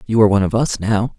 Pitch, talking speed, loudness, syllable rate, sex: 105 Hz, 305 wpm, -16 LUFS, 7.5 syllables/s, male